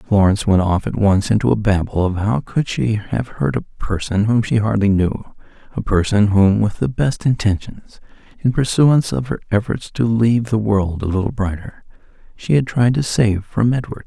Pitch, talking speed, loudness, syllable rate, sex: 105 Hz, 195 wpm, -17 LUFS, 4.9 syllables/s, male